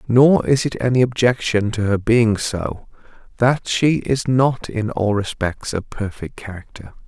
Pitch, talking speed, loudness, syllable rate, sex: 115 Hz, 160 wpm, -19 LUFS, 4.1 syllables/s, male